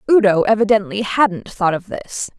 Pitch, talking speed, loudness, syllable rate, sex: 205 Hz, 150 wpm, -17 LUFS, 4.7 syllables/s, female